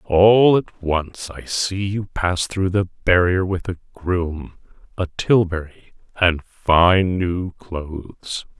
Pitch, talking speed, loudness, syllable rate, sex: 90 Hz, 135 wpm, -19 LUFS, 3.1 syllables/s, male